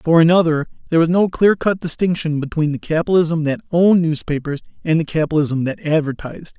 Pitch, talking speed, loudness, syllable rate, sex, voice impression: 160 Hz, 175 wpm, -17 LUFS, 6.3 syllables/s, male, masculine, adult-like, tensed, powerful, clear, slightly fluent, intellectual, calm, wild, lively, slightly strict